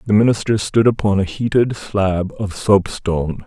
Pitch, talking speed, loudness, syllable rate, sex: 100 Hz, 175 wpm, -17 LUFS, 4.6 syllables/s, male